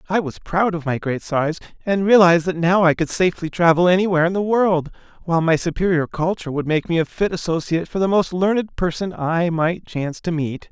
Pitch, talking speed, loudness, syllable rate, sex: 175 Hz, 220 wpm, -19 LUFS, 5.9 syllables/s, male